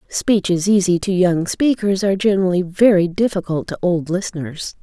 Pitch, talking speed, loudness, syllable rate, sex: 185 Hz, 150 wpm, -17 LUFS, 5.2 syllables/s, female